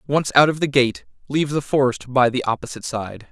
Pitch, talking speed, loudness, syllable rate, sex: 135 Hz, 220 wpm, -20 LUFS, 5.9 syllables/s, male